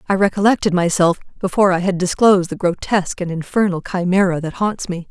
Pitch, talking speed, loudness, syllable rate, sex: 185 Hz, 175 wpm, -17 LUFS, 6.1 syllables/s, female